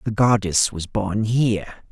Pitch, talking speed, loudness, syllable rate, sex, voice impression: 105 Hz, 155 wpm, -20 LUFS, 4.3 syllables/s, male, masculine, adult-like, powerful, hard, clear, slightly halting, raspy, cool, slightly mature, wild, strict, slightly intense, sharp